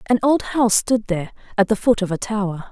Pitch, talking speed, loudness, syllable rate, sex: 215 Hz, 245 wpm, -19 LUFS, 6.4 syllables/s, female